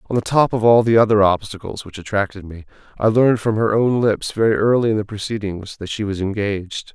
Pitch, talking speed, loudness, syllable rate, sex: 105 Hz, 225 wpm, -18 LUFS, 5.9 syllables/s, male